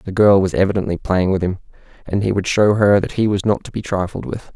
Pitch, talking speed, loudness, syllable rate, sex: 100 Hz, 265 wpm, -17 LUFS, 5.9 syllables/s, male